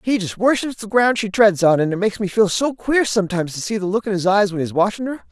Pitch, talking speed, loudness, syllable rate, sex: 205 Hz, 305 wpm, -18 LUFS, 6.5 syllables/s, female